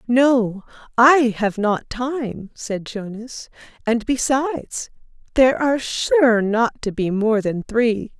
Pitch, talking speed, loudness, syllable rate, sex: 235 Hz, 130 wpm, -19 LUFS, 3.4 syllables/s, female